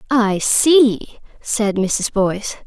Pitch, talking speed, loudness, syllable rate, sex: 220 Hz, 110 wpm, -16 LUFS, 3.1 syllables/s, female